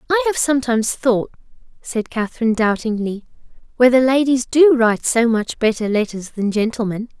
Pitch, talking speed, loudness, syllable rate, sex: 240 Hz, 140 wpm, -17 LUFS, 5.5 syllables/s, female